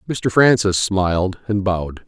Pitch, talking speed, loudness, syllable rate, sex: 100 Hz, 145 wpm, -18 LUFS, 4.5 syllables/s, male